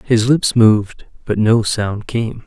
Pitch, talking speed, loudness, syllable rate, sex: 115 Hz, 170 wpm, -15 LUFS, 3.6 syllables/s, male